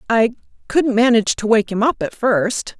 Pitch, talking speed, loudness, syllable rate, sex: 230 Hz, 215 wpm, -17 LUFS, 5.4 syllables/s, female